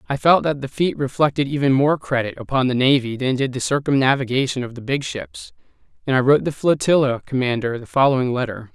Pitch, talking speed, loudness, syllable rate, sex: 135 Hz, 200 wpm, -19 LUFS, 6.0 syllables/s, male